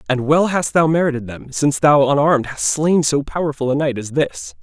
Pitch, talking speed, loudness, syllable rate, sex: 145 Hz, 220 wpm, -17 LUFS, 5.5 syllables/s, male